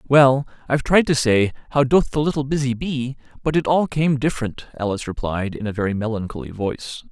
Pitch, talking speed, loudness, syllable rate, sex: 130 Hz, 195 wpm, -21 LUFS, 5.8 syllables/s, male